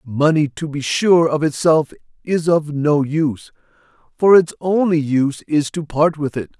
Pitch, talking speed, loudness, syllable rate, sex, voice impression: 155 Hz, 175 wpm, -17 LUFS, 4.5 syllables/s, male, masculine, very adult-like, slightly thick, slightly wild